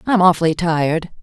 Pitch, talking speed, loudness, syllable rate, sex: 170 Hz, 145 wpm, -16 LUFS, 5.9 syllables/s, female